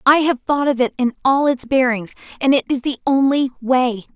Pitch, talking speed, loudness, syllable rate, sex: 260 Hz, 215 wpm, -18 LUFS, 5.2 syllables/s, female